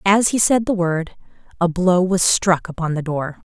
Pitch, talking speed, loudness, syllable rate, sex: 180 Hz, 205 wpm, -18 LUFS, 4.4 syllables/s, female